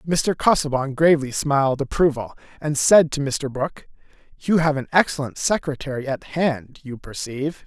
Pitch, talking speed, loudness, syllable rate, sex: 145 Hz, 150 wpm, -21 LUFS, 5.1 syllables/s, male